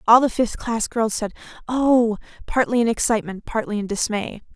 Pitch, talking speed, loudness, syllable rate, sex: 225 Hz, 170 wpm, -21 LUFS, 5.2 syllables/s, female